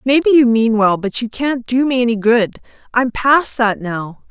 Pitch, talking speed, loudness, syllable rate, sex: 235 Hz, 210 wpm, -15 LUFS, 4.4 syllables/s, female